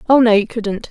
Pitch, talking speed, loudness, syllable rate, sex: 225 Hz, 265 wpm, -15 LUFS, 5.5 syllables/s, female